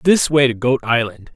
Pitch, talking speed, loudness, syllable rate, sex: 130 Hz, 220 wpm, -16 LUFS, 5.0 syllables/s, male